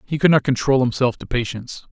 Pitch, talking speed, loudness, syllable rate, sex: 130 Hz, 215 wpm, -19 LUFS, 6.2 syllables/s, male